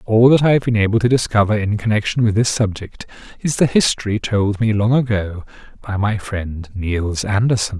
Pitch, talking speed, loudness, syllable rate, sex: 105 Hz, 190 wpm, -17 LUFS, 5.2 syllables/s, male